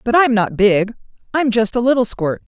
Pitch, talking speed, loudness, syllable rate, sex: 230 Hz, 210 wpm, -16 LUFS, 5.1 syllables/s, female